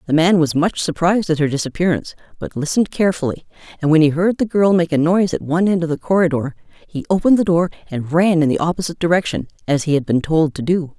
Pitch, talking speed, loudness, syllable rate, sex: 165 Hz, 235 wpm, -17 LUFS, 6.8 syllables/s, female